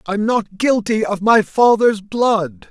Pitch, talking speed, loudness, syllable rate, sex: 210 Hz, 155 wpm, -16 LUFS, 3.5 syllables/s, male